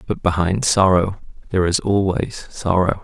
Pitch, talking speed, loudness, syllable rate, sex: 95 Hz, 140 wpm, -19 LUFS, 4.7 syllables/s, male